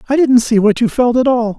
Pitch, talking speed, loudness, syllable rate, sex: 240 Hz, 305 wpm, -13 LUFS, 5.7 syllables/s, male